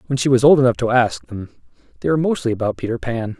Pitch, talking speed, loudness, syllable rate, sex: 115 Hz, 245 wpm, -18 LUFS, 6.9 syllables/s, male